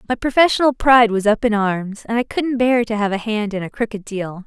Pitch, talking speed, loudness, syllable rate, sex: 220 Hz, 255 wpm, -18 LUFS, 5.6 syllables/s, female